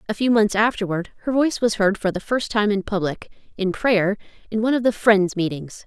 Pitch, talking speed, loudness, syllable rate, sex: 210 Hz, 225 wpm, -21 LUFS, 5.7 syllables/s, female